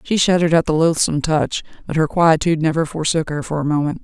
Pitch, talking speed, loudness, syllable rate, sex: 160 Hz, 225 wpm, -18 LUFS, 6.5 syllables/s, female